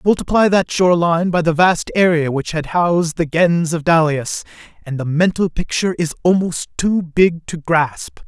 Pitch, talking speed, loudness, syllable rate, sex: 170 Hz, 175 wpm, -16 LUFS, 4.8 syllables/s, male